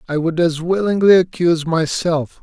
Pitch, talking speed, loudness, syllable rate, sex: 165 Hz, 150 wpm, -16 LUFS, 4.9 syllables/s, male